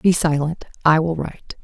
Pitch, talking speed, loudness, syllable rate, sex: 160 Hz, 185 wpm, -20 LUFS, 5.1 syllables/s, female